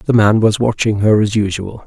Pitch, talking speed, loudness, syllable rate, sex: 105 Hz, 225 wpm, -14 LUFS, 4.9 syllables/s, male